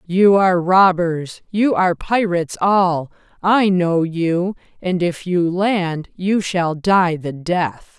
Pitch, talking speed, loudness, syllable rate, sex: 180 Hz, 145 wpm, -17 LUFS, 3.3 syllables/s, female